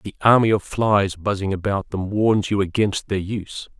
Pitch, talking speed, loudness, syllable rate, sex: 100 Hz, 190 wpm, -20 LUFS, 4.7 syllables/s, male